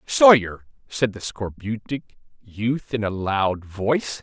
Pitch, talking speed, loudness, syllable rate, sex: 110 Hz, 130 wpm, -22 LUFS, 3.5 syllables/s, male